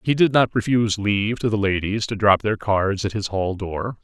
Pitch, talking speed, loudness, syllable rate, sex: 105 Hz, 240 wpm, -21 LUFS, 5.1 syllables/s, male